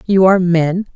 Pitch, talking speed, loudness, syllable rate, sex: 180 Hz, 190 wpm, -13 LUFS, 5.2 syllables/s, female